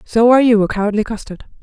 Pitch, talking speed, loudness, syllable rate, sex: 220 Hz, 220 wpm, -14 LUFS, 7.1 syllables/s, female